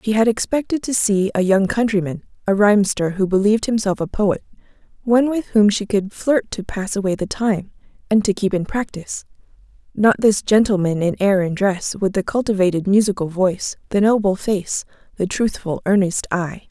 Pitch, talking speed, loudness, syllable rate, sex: 200 Hz, 175 wpm, -19 LUFS, 5.3 syllables/s, female